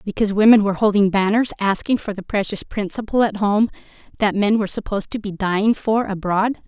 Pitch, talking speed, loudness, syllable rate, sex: 205 Hz, 190 wpm, -19 LUFS, 6.0 syllables/s, female